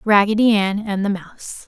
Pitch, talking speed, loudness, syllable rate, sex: 205 Hz, 180 wpm, -18 LUFS, 5.1 syllables/s, female